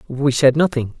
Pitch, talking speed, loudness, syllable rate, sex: 135 Hz, 180 wpm, -16 LUFS, 4.9 syllables/s, male